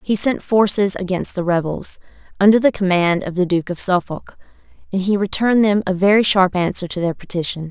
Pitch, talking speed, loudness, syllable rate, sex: 190 Hz, 195 wpm, -17 LUFS, 5.6 syllables/s, female